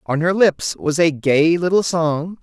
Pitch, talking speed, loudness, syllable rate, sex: 165 Hz, 200 wpm, -17 LUFS, 4.0 syllables/s, male